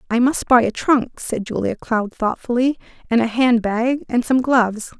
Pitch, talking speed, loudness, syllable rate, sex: 240 Hz, 190 wpm, -19 LUFS, 4.6 syllables/s, female